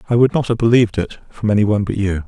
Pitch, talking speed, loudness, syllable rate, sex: 110 Hz, 290 wpm, -16 LUFS, 7.5 syllables/s, male